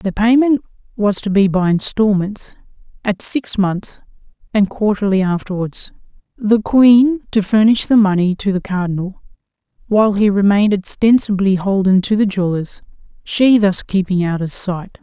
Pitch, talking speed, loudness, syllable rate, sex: 200 Hz, 145 wpm, -15 LUFS, 4.7 syllables/s, female